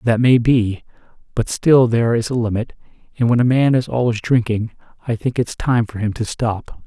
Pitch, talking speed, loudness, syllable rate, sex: 115 Hz, 210 wpm, -18 LUFS, 5.1 syllables/s, male